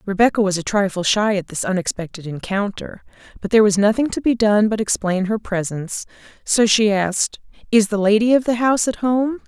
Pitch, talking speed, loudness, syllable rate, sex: 210 Hz, 195 wpm, -18 LUFS, 5.7 syllables/s, female